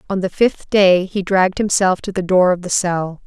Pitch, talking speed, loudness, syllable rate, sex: 185 Hz, 240 wpm, -16 LUFS, 4.9 syllables/s, female